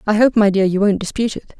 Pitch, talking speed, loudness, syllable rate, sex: 205 Hz, 300 wpm, -16 LUFS, 6.9 syllables/s, female